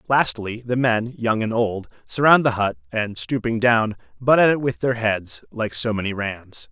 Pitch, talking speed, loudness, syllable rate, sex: 115 Hz, 195 wpm, -21 LUFS, 4.4 syllables/s, male